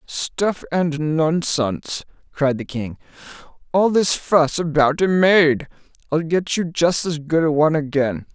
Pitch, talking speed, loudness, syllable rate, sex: 155 Hz, 150 wpm, -19 LUFS, 3.9 syllables/s, male